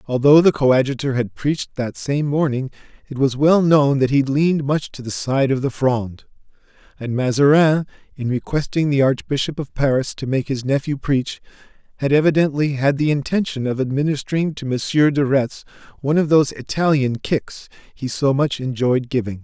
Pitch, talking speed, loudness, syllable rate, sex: 140 Hz, 175 wpm, -19 LUFS, 5.3 syllables/s, male